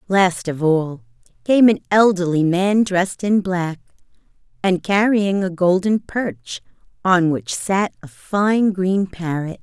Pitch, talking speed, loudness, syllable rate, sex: 185 Hz, 135 wpm, -18 LUFS, 3.7 syllables/s, female